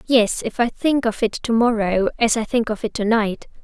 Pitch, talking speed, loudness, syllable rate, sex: 225 Hz, 245 wpm, -20 LUFS, 4.9 syllables/s, female